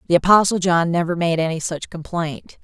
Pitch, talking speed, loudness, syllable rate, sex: 170 Hz, 180 wpm, -19 LUFS, 5.3 syllables/s, female